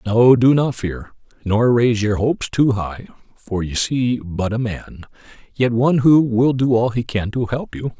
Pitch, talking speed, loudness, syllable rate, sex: 115 Hz, 195 wpm, -18 LUFS, 4.5 syllables/s, male